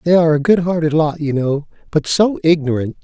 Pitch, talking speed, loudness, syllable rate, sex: 160 Hz, 195 wpm, -16 LUFS, 5.8 syllables/s, male